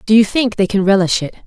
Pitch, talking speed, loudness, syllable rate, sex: 205 Hz, 285 wpm, -14 LUFS, 6.3 syllables/s, female